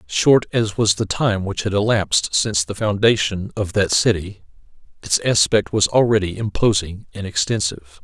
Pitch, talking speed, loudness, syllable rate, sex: 100 Hz, 155 wpm, -18 LUFS, 4.9 syllables/s, male